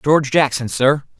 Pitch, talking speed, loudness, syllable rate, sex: 140 Hz, 150 wpm, -16 LUFS, 5.1 syllables/s, male